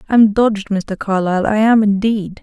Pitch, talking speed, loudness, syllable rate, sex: 205 Hz, 175 wpm, -15 LUFS, 4.9 syllables/s, female